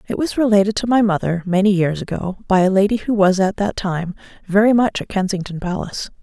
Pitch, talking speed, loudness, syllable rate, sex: 200 Hz, 210 wpm, -18 LUFS, 5.9 syllables/s, female